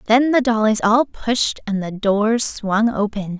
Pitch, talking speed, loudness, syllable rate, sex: 220 Hz, 175 wpm, -18 LUFS, 3.8 syllables/s, female